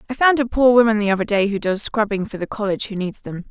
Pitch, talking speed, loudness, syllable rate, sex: 210 Hz, 290 wpm, -19 LUFS, 6.7 syllables/s, female